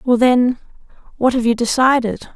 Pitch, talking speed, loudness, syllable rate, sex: 240 Hz, 155 wpm, -16 LUFS, 4.9 syllables/s, female